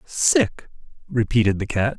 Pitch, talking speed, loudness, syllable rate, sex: 120 Hz, 120 wpm, -21 LUFS, 4.1 syllables/s, male